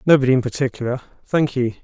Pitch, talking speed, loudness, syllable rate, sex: 130 Hz, 165 wpm, -20 LUFS, 6.8 syllables/s, male